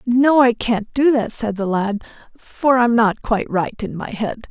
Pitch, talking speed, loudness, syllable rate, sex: 230 Hz, 215 wpm, -18 LUFS, 4.2 syllables/s, female